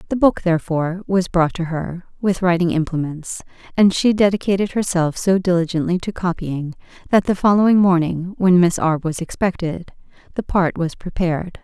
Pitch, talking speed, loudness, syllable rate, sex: 180 Hz, 160 wpm, -19 LUFS, 5.3 syllables/s, female